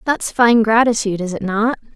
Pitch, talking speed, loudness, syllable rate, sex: 220 Hz, 185 wpm, -16 LUFS, 5.5 syllables/s, female